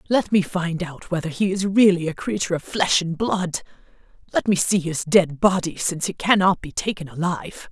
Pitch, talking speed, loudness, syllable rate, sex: 180 Hz, 195 wpm, -21 LUFS, 5.3 syllables/s, female